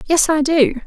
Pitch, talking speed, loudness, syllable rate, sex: 295 Hz, 210 wpm, -15 LUFS, 4.2 syllables/s, female